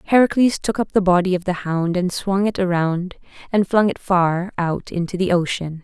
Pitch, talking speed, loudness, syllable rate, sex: 185 Hz, 205 wpm, -19 LUFS, 5.0 syllables/s, female